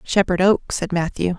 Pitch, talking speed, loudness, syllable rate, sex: 180 Hz, 175 wpm, -19 LUFS, 4.7 syllables/s, female